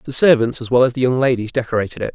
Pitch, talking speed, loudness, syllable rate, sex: 125 Hz, 280 wpm, -17 LUFS, 7.5 syllables/s, male